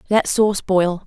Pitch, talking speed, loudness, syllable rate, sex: 195 Hz, 170 wpm, -18 LUFS, 4.7 syllables/s, female